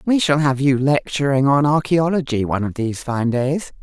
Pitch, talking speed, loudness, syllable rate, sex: 140 Hz, 190 wpm, -18 LUFS, 5.2 syllables/s, female